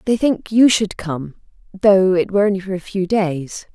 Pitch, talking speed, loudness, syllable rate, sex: 190 Hz, 210 wpm, -17 LUFS, 4.6 syllables/s, female